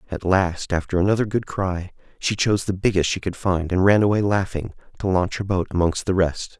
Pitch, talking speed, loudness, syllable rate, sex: 95 Hz, 220 wpm, -22 LUFS, 5.5 syllables/s, male